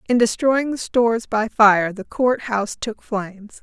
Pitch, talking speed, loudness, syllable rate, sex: 225 Hz, 180 wpm, -19 LUFS, 4.4 syllables/s, female